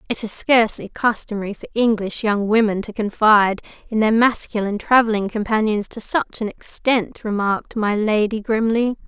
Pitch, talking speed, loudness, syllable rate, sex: 220 Hz, 150 wpm, -19 LUFS, 5.2 syllables/s, female